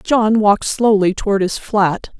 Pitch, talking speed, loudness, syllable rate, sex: 205 Hz, 165 wpm, -15 LUFS, 4.3 syllables/s, female